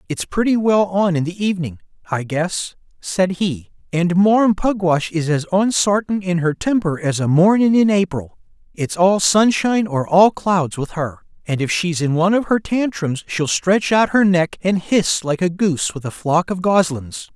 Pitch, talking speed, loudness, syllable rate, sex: 180 Hz, 195 wpm, -17 LUFS, 4.5 syllables/s, male